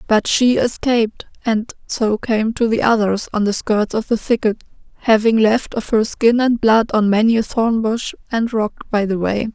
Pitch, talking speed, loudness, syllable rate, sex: 220 Hz, 195 wpm, -17 LUFS, 4.5 syllables/s, female